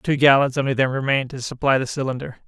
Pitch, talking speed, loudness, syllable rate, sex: 135 Hz, 220 wpm, -20 LUFS, 6.7 syllables/s, male